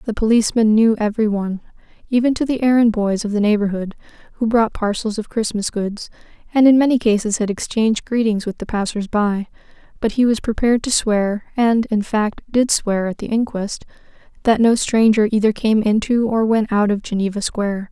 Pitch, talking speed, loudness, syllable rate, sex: 220 Hz, 190 wpm, -18 LUFS, 5.5 syllables/s, female